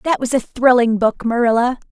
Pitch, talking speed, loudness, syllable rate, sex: 240 Hz, 190 wpm, -16 LUFS, 5.3 syllables/s, female